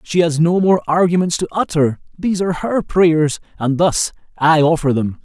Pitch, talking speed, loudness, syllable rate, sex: 165 Hz, 170 wpm, -16 LUFS, 4.9 syllables/s, male